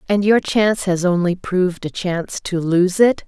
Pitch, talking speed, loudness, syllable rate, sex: 185 Hz, 200 wpm, -18 LUFS, 4.9 syllables/s, female